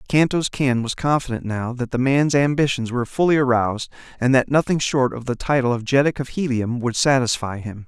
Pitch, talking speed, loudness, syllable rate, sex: 130 Hz, 200 wpm, -20 LUFS, 5.6 syllables/s, male